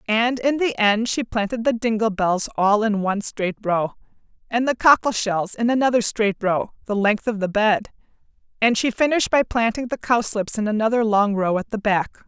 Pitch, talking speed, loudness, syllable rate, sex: 220 Hz, 200 wpm, -20 LUFS, 5.0 syllables/s, female